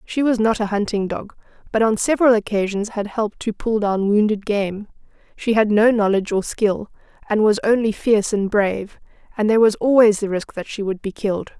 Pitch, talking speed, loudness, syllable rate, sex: 210 Hz, 205 wpm, -19 LUFS, 5.6 syllables/s, female